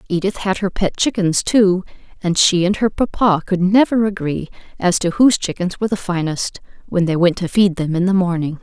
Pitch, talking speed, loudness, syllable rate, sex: 185 Hz, 210 wpm, -17 LUFS, 5.4 syllables/s, female